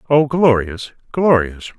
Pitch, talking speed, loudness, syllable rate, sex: 125 Hz, 100 wpm, -16 LUFS, 3.6 syllables/s, male